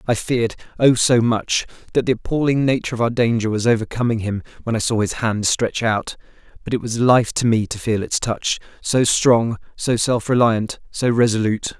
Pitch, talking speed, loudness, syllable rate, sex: 115 Hz, 195 wpm, -19 LUFS, 5.3 syllables/s, male